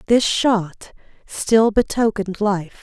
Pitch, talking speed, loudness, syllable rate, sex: 210 Hz, 105 wpm, -18 LUFS, 3.6 syllables/s, female